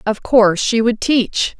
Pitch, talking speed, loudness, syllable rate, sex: 225 Hz, 190 wpm, -15 LUFS, 4.1 syllables/s, female